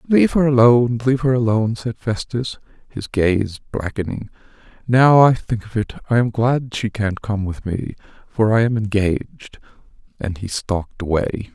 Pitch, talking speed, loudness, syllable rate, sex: 110 Hz, 165 wpm, -19 LUFS, 4.8 syllables/s, male